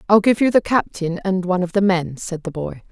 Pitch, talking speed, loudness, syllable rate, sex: 185 Hz, 265 wpm, -19 LUFS, 5.6 syllables/s, female